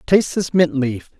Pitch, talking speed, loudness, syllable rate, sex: 155 Hz, 200 wpm, -18 LUFS, 5.0 syllables/s, male